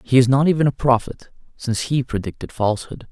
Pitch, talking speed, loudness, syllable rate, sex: 125 Hz, 195 wpm, -19 LUFS, 6.2 syllables/s, male